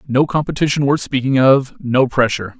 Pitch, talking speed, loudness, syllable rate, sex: 130 Hz, 140 wpm, -16 LUFS, 5.5 syllables/s, male